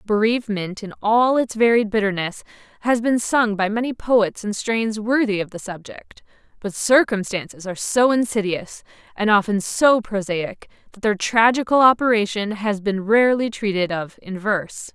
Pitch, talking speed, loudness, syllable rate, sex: 215 Hz, 155 wpm, -20 LUFS, 4.8 syllables/s, female